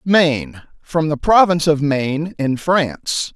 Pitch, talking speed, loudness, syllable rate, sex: 155 Hz, 125 wpm, -17 LUFS, 4.3 syllables/s, male